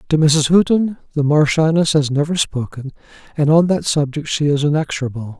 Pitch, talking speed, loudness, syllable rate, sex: 150 Hz, 165 wpm, -16 LUFS, 5.4 syllables/s, male